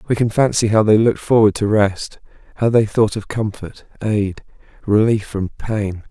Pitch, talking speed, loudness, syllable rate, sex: 105 Hz, 175 wpm, -17 LUFS, 4.6 syllables/s, male